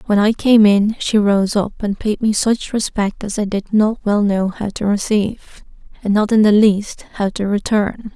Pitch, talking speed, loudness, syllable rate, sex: 210 Hz, 215 wpm, -16 LUFS, 4.5 syllables/s, female